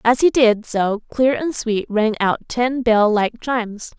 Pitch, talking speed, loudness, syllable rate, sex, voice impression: 230 Hz, 195 wpm, -18 LUFS, 4.0 syllables/s, female, feminine, adult-like, tensed, powerful, bright, clear, fluent, friendly, unique, intense, slightly sharp, light